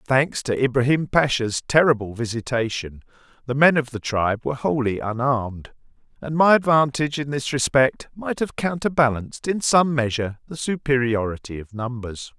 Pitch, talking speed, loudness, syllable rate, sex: 130 Hz, 145 wpm, -21 LUFS, 5.2 syllables/s, male